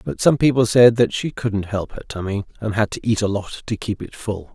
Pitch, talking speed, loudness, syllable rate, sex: 110 Hz, 265 wpm, -20 LUFS, 5.3 syllables/s, male